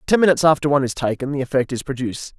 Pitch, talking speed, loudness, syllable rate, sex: 140 Hz, 250 wpm, -19 LUFS, 8.0 syllables/s, male